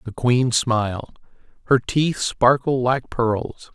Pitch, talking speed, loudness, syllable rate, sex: 125 Hz, 110 wpm, -20 LUFS, 3.2 syllables/s, male